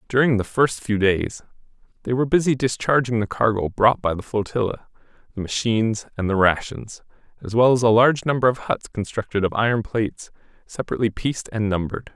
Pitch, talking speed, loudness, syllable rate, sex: 115 Hz, 180 wpm, -21 LUFS, 6.0 syllables/s, male